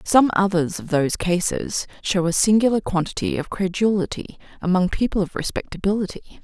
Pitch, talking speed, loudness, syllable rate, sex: 190 Hz, 140 wpm, -21 LUFS, 5.6 syllables/s, female